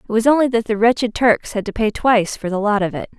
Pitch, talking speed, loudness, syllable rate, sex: 220 Hz, 300 wpm, -17 LUFS, 6.4 syllables/s, female